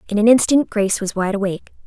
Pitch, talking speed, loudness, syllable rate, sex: 210 Hz, 225 wpm, -17 LUFS, 7.1 syllables/s, female